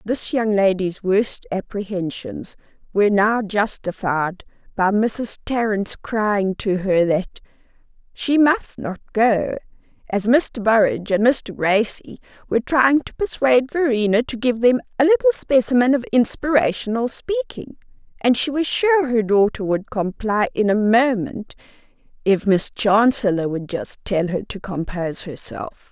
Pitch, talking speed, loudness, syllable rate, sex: 220 Hz, 140 wpm, -19 LUFS, 4.2 syllables/s, female